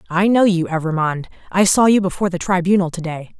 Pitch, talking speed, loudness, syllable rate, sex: 180 Hz, 210 wpm, -17 LUFS, 6.4 syllables/s, female